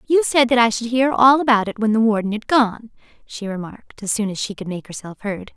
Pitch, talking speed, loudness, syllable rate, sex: 225 Hz, 250 wpm, -18 LUFS, 5.5 syllables/s, female